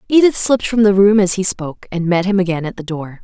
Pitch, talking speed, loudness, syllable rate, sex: 195 Hz, 280 wpm, -15 LUFS, 6.3 syllables/s, female